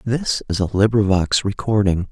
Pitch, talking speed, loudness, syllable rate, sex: 105 Hz, 140 wpm, -18 LUFS, 4.7 syllables/s, male